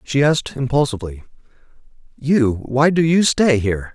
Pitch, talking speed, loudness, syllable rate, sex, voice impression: 130 Hz, 135 wpm, -17 LUFS, 5.3 syllables/s, male, masculine, middle-aged, powerful, hard, raspy, sincere, mature, wild, lively, strict